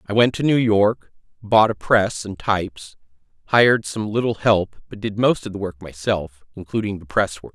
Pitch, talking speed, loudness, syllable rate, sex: 100 Hz, 200 wpm, -20 LUFS, 4.8 syllables/s, male